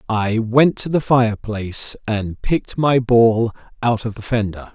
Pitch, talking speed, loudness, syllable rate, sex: 115 Hz, 165 wpm, -18 LUFS, 4.3 syllables/s, male